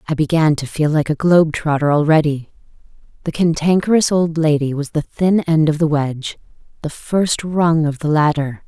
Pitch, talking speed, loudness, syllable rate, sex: 155 Hz, 175 wpm, -16 LUFS, 5.0 syllables/s, female